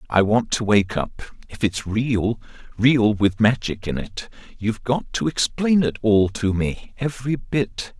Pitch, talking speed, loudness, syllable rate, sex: 110 Hz, 150 wpm, -21 LUFS, 4.1 syllables/s, male